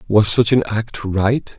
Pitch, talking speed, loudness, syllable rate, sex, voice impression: 105 Hz, 190 wpm, -17 LUFS, 3.7 syllables/s, male, masculine, middle-aged, slightly relaxed, powerful, slightly soft, slightly muffled, slightly raspy, intellectual, calm, slightly mature, slightly reassuring, wild, slightly kind, modest